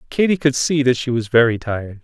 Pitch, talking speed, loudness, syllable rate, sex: 130 Hz, 235 wpm, -17 LUFS, 6.0 syllables/s, male